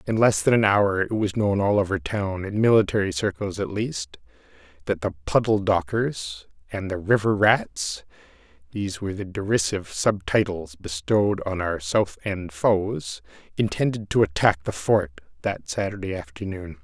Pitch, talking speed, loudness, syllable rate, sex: 105 Hz, 155 wpm, -24 LUFS, 3.5 syllables/s, male